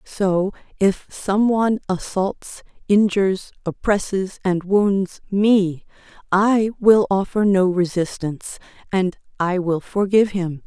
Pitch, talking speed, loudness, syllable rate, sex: 195 Hz, 105 wpm, -20 LUFS, 3.7 syllables/s, female